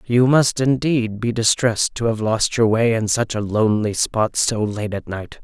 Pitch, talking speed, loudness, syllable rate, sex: 115 Hz, 210 wpm, -19 LUFS, 4.5 syllables/s, male